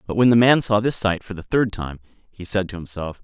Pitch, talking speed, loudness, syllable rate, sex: 100 Hz, 280 wpm, -20 LUFS, 5.5 syllables/s, male